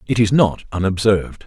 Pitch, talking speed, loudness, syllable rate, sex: 105 Hz, 165 wpm, -17 LUFS, 5.5 syllables/s, male